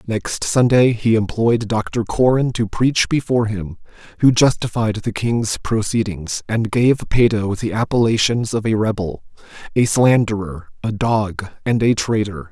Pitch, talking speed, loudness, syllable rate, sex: 110 Hz, 145 wpm, -18 LUFS, 4.3 syllables/s, male